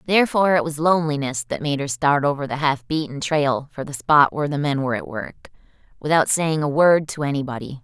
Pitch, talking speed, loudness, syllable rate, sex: 145 Hz, 215 wpm, -20 LUFS, 6.0 syllables/s, female